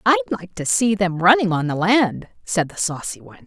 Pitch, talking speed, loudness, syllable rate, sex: 195 Hz, 225 wpm, -19 LUFS, 5.2 syllables/s, female